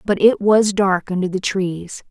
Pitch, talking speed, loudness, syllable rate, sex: 195 Hz, 200 wpm, -17 LUFS, 4.1 syllables/s, female